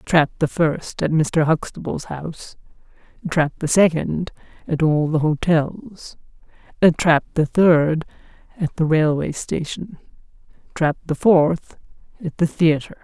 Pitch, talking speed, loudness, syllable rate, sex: 160 Hz, 125 wpm, -19 LUFS, 3.9 syllables/s, female